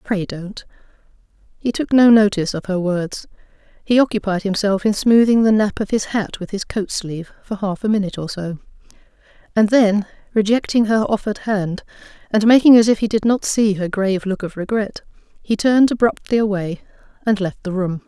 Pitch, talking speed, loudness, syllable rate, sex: 205 Hz, 185 wpm, -18 LUFS, 5.5 syllables/s, female